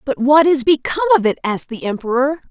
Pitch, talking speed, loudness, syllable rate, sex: 270 Hz, 215 wpm, -16 LUFS, 6.3 syllables/s, female